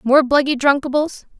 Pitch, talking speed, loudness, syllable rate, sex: 275 Hz, 130 wpm, -17 LUFS, 5.1 syllables/s, female